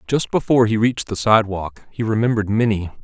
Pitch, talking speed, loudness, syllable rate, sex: 110 Hz, 180 wpm, -18 LUFS, 6.3 syllables/s, male